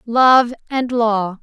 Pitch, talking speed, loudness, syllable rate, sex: 235 Hz, 125 wpm, -15 LUFS, 2.6 syllables/s, female